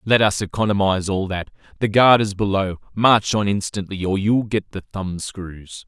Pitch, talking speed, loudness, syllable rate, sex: 100 Hz, 185 wpm, -20 LUFS, 4.8 syllables/s, male